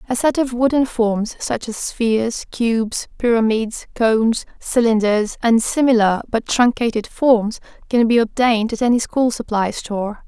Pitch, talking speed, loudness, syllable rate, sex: 230 Hz, 145 wpm, -18 LUFS, 4.5 syllables/s, female